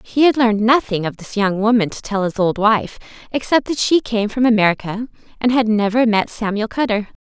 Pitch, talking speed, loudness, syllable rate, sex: 225 Hz, 205 wpm, -17 LUFS, 5.4 syllables/s, female